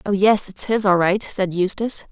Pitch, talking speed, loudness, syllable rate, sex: 200 Hz, 225 wpm, -19 LUFS, 5.1 syllables/s, female